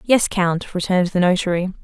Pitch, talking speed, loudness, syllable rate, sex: 185 Hz, 165 wpm, -19 LUFS, 5.6 syllables/s, female